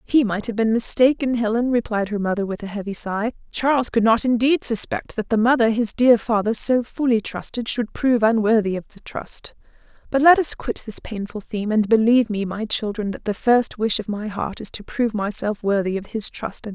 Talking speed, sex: 220 wpm, female